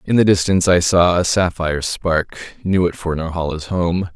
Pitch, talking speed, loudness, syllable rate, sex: 85 Hz, 190 wpm, -17 LUFS, 5.2 syllables/s, male